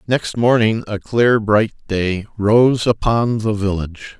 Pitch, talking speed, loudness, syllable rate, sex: 110 Hz, 145 wpm, -17 LUFS, 3.8 syllables/s, male